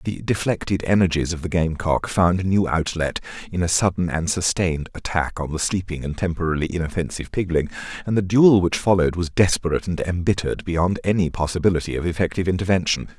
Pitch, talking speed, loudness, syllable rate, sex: 85 Hz, 170 wpm, -21 LUFS, 6.3 syllables/s, male